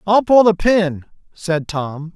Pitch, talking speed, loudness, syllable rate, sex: 180 Hz, 165 wpm, -16 LUFS, 3.5 syllables/s, male